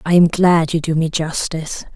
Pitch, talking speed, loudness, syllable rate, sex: 165 Hz, 215 wpm, -17 LUFS, 5.1 syllables/s, female